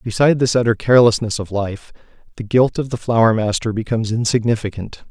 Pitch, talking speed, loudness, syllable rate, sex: 115 Hz, 165 wpm, -17 LUFS, 6.2 syllables/s, male